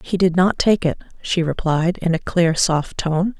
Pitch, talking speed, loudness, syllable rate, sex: 170 Hz, 210 wpm, -19 LUFS, 4.3 syllables/s, female